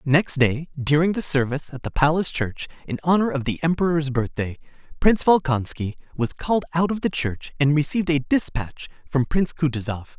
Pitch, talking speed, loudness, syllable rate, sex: 150 Hz, 175 wpm, -22 LUFS, 5.7 syllables/s, male